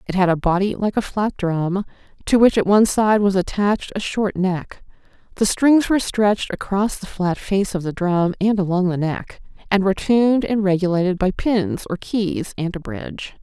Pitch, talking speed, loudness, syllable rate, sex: 195 Hz, 200 wpm, -19 LUFS, 5.1 syllables/s, female